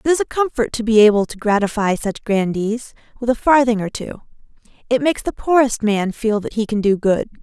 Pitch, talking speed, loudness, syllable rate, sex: 225 Hz, 220 wpm, -18 LUFS, 5.7 syllables/s, female